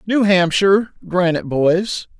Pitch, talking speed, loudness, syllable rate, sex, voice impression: 185 Hz, 110 wpm, -16 LUFS, 4.4 syllables/s, male, masculine, middle-aged, tensed, powerful, slightly halting, slightly mature, friendly, wild, lively, strict, intense, slightly sharp, slightly light